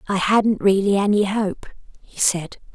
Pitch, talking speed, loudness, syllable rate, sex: 200 Hz, 155 wpm, -19 LUFS, 4.1 syllables/s, female